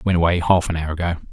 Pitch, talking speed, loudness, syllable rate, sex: 85 Hz, 275 wpm, -19 LUFS, 7.0 syllables/s, male